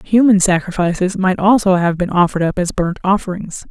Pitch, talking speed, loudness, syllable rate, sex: 185 Hz, 180 wpm, -15 LUFS, 5.6 syllables/s, female